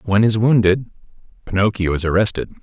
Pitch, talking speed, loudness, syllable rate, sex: 100 Hz, 135 wpm, -17 LUFS, 6.1 syllables/s, male